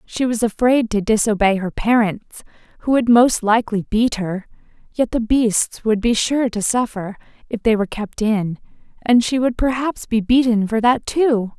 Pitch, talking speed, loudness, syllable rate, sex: 225 Hz, 180 wpm, -18 LUFS, 4.6 syllables/s, female